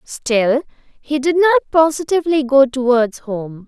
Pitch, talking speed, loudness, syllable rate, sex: 275 Hz, 130 wpm, -16 LUFS, 4.5 syllables/s, female